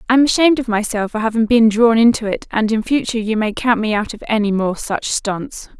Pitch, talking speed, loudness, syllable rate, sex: 225 Hz, 240 wpm, -16 LUFS, 5.6 syllables/s, female